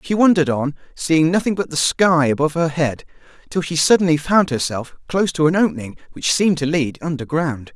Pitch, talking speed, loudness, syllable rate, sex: 155 Hz, 195 wpm, -18 LUFS, 5.9 syllables/s, male